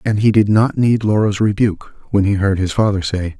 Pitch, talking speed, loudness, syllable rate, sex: 105 Hz, 230 wpm, -16 LUFS, 5.4 syllables/s, male